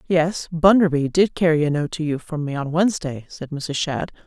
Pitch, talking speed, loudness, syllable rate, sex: 160 Hz, 210 wpm, -21 LUFS, 5.1 syllables/s, female